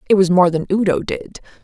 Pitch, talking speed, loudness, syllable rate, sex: 200 Hz, 220 wpm, -16 LUFS, 6.7 syllables/s, female